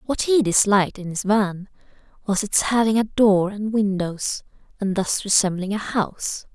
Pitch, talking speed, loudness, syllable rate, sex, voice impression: 205 Hz, 165 wpm, -21 LUFS, 4.6 syllables/s, female, very feminine, young, very thin, slightly tensed, slightly powerful, slightly dark, soft, clear, fluent, slightly raspy, cute, slightly intellectual, refreshing, sincere, calm, very friendly, very reassuring, very unique, elegant, slightly wild, very sweet, lively, very kind, modest, light